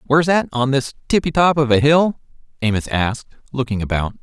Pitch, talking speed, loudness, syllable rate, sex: 135 Hz, 185 wpm, -18 LUFS, 5.8 syllables/s, male